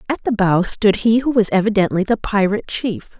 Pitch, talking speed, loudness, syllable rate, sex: 205 Hz, 205 wpm, -17 LUFS, 5.6 syllables/s, female